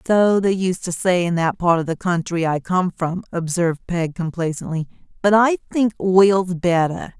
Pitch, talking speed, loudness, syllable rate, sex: 180 Hz, 185 wpm, -19 LUFS, 4.5 syllables/s, female